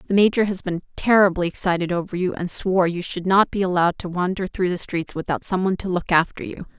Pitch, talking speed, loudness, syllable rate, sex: 180 Hz, 230 wpm, -21 LUFS, 6.3 syllables/s, female